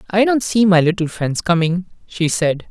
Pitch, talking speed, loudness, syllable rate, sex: 180 Hz, 200 wpm, -17 LUFS, 4.8 syllables/s, male